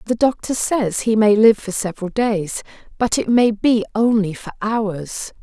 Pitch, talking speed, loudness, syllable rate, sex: 215 Hz, 175 wpm, -18 LUFS, 4.3 syllables/s, female